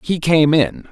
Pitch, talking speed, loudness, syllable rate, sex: 150 Hz, 200 wpm, -15 LUFS, 3.8 syllables/s, male